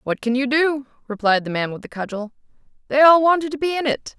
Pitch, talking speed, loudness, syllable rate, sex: 260 Hz, 245 wpm, -19 LUFS, 6.1 syllables/s, female